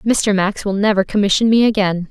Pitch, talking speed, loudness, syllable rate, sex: 205 Hz, 200 wpm, -15 LUFS, 5.3 syllables/s, female